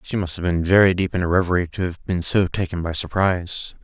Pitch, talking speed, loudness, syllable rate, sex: 90 Hz, 250 wpm, -20 LUFS, 6.0 syllables/s, male